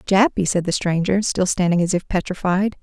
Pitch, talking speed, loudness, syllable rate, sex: 185 Hz, 190 wpm, -20 LUFS, 5.1 syllables/s, female